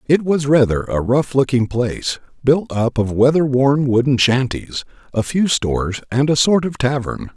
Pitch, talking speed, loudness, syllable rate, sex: 130 Hz, 180 wpm, -17 LUFS, 4.7 syllables/s, male